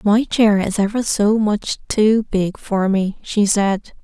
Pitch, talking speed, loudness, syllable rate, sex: 205 Hz, 180 wpm, -17 LUFS, 3.5 syllables/s, female